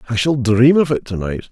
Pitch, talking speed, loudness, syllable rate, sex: 125 Hz, 275 wpm, -16 LUFS, 5.7 syllables/s, male